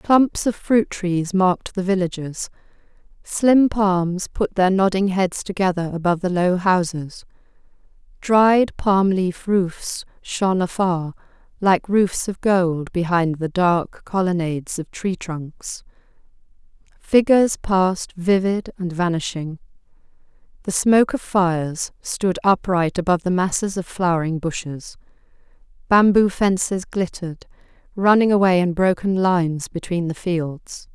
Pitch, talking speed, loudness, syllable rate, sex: 185 Hz, 120 wpm, -20 LUFS, 4.1 syllables/s, female